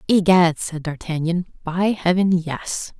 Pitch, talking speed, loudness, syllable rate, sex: 175 Hz, 120 wpm, -20 LUFS, 3.8 syllables/s, female